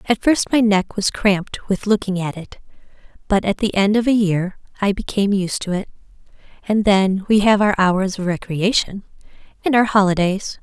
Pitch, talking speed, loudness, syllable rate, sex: 200 Hz, 185 wpm, -18 LUFS, 5.0 syllables/s, female